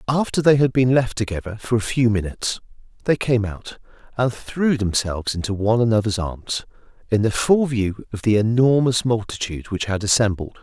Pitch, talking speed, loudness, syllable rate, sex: 115 Hz, 175 wpm, -20 LUFS, 5.4 syllables/s, male